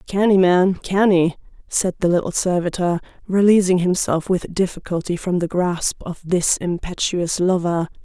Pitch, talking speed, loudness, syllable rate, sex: 180 Hz, 135 wpm, -19 LUFS, 4.5 syllables/s, female